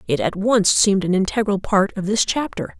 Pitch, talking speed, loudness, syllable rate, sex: 200 Hz, 215 wpm, -19 LUFS, 5.4 syllables/s, female